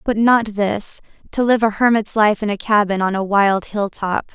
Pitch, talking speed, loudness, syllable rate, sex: 210 Hz, 205 wpm, -17 LUFS, 4.6 syllables/s, female